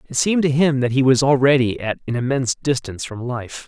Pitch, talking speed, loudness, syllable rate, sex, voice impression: 130 Hz, 230 wpm, -19 LUFS, 6.1 syllables/s, male, masculine, very adult-like, slightly thick, slightly fluent, slightly refreshing, sincere